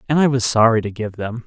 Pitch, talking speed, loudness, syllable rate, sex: 115 Hz, 285 wpm, -18 LUFS, 6.2 syllables/s, male